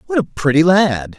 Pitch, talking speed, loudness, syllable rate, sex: 150 Hz, 205 wpm, -14 LUFS, 4.9 syllables/s, male